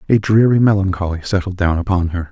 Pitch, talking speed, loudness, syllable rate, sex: 95 Hz, 180 wpm, -16 LUFS, 6.2 syllables/s, male